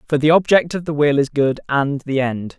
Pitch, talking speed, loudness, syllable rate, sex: 145 Hz, 255 wpm, -17 LUFS, 5.2 syllables/s, male